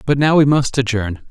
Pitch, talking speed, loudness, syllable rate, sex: 130 Hz, 230 wpm, -15 LUFS, 5.1 syllables/s, male